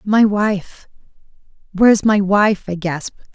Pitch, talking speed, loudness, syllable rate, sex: 200 Hz, 125 wpm, -16 LUFS, 4.5 syllables/s, female